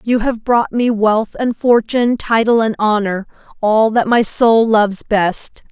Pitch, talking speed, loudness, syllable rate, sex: 220 Hz, 160 wpm, -14 LUFS, 4.1 syllables/s, female